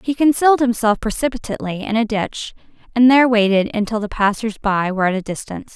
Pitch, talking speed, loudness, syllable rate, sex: 225 Hz, 190 wpm, -17 LUFS, 6.3 syllables/s, female